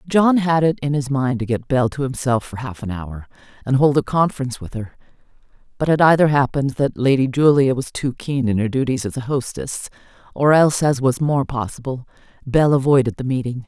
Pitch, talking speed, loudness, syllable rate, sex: 135 Hz, 205 wpm, -19 LUFS, 5.6 syllables/s, female